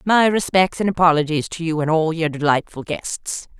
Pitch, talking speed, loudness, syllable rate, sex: 165 Hz, 185 wpm, -19 LUFS, 5.0 syllables/s, female